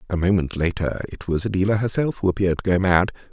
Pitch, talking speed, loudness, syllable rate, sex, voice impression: 95 Hz, 215 wpm, -22 LUFS, 6.7 syllables/s, male, very masculine, very adult-like, slightly old, slightly thick, slightly relaxed, slightly weak, slightly bright, soft, muffled, slightly fluent, raspy, cool, very intellectual, very sincere, very calm, very mature, friendly, very reassuring, unique, slightly elegant, wild, slightly sweet, lively, kind, slightly modest